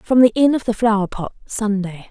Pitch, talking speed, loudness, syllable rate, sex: 220 Hz, 230 wpm, -18 LUFS, 5.2 syllables/s, female